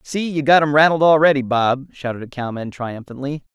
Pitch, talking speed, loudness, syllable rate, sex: 140 Hz, 185 wpm, -18 LUFS, 5.7 syllables/s, male